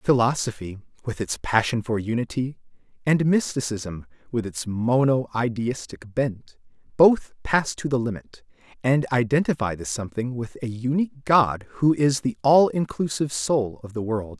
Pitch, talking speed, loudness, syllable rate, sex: 125 Hz, 140 wpm, -23 LUFS, 4.6 syllables/s, male